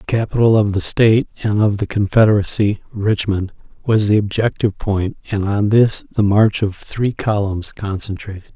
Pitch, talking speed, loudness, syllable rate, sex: 105 Hz, 160 wpm, -17 LUFS, 5.0 syllables/s, male